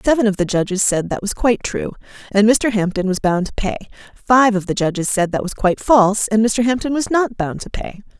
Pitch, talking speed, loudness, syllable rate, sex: 210 Hz, 240 wpm, -17 LUFS, 5.8 syllables/s, female